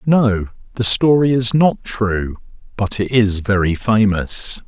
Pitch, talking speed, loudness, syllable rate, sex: 110 Hz, 140 wpm, -16 LUFS, 3.6 syllables/s, male